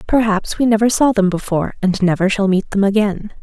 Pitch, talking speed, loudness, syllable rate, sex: 205 Hz, 210 wpm, -16 LUFS, 5.8 syllables/s, female